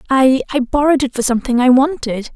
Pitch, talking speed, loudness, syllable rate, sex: 260 Hz, 180 wpm, -15 LUFS, 6.5 syllables/s, female